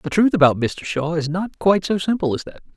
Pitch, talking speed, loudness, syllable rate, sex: 175 Hz, 260 wpm, -19 LUFS, 5.8 syllables/s, male